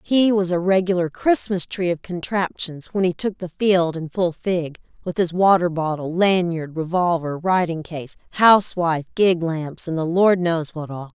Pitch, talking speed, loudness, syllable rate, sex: 175 Hz, 175 wpm, -20 LUFS, 4.5 syllables/s, female